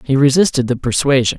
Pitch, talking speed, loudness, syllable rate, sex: 135 Hz, 175 wpm, -14 LUFS, 6.2 syllables/s, male